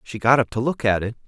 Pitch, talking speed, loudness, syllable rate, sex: 120 Hz, 330 wpm, -20 LUFS, 6.5 syllables/s, male